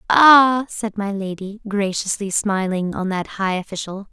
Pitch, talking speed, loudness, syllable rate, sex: 205 Hz, 145 wpm, -19 LUFS, 4.2 syllables/s, female